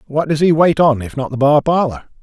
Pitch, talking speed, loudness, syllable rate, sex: 145 Hz, 270 wpm, -15 LUFS, 5.6 syllables/s, male